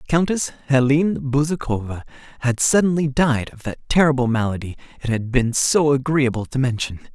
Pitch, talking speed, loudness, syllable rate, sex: 135 Hz, 145 wpm, -20 LUFS, 5.3 syllables/s, male